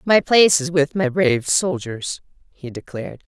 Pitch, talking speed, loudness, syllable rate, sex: 180 Hz, 160 wpm, -18 LUFS, 4.8 syllables/s, female